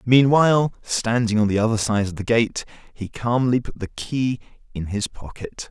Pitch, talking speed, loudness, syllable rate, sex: 115 Hz, 180 wpm, -21 LUFS, 4.7 syllables/s, male